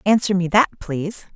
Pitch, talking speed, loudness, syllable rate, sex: 190 Hz, 180 wpm, -20 LUFS, 5.7 syllables/s, female